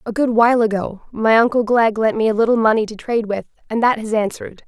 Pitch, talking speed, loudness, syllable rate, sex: 225 Hz, 245 wpm, -17 LUFS, 6.4 syllables/s, female